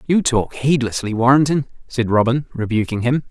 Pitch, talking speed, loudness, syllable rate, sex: 125 Hz, 145 wpm, -18 LUFS, 5.2 syllables/s, male